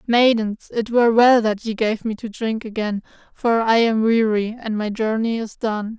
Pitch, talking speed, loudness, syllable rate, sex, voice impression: 225 Hz, 200 wpm, -19 LUFS, 4.6 syllables/s, female, feminine, adult-like, tensed, slightly powerful, bright, soft, clear, friendly, reassuring, lively, sharp